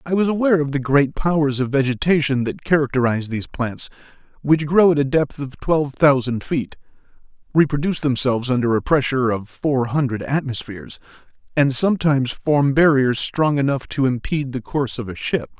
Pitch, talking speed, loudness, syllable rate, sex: 140 Hz, 170 wpm, -19 LUFS, 5.7 syllables/s, male